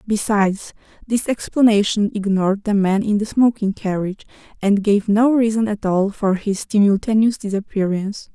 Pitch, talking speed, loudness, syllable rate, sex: 205 Hz, 145 wpm, -18 LUFS, 5.1 syllables/s, female